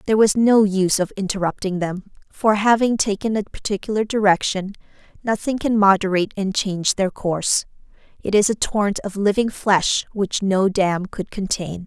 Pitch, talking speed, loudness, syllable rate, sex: 200 Hz, 160 wpm, -20 LUFS, 5.2 syllables/s, female